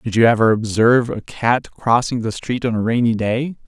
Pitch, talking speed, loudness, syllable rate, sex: 115 Hz, 210 wpm, -18 LUFS, 5.2 syllables/s, male